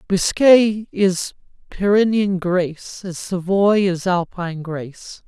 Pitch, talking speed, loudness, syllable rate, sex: 185 Hz, 100 wpm, -18 LUFS, 3.6 syllables/s, male